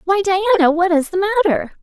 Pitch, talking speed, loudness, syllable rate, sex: 365 Hz, 200 wpm, -16 LUFS, 7.5 syllables/s, female